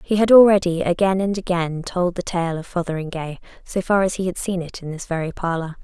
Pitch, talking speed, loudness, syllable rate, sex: 180 Hz, 225 wpm, -20 LUFS, 5.7 syllables/s, female